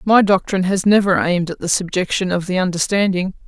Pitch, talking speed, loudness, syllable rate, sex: 185 Hz, 190 wpm, -17 LUFS, 6.1 syllables/s, female